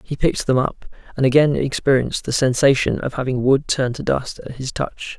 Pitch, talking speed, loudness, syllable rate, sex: 135 Hz, 210 wpm, -19 LUFS, 5.4 syllables/s, male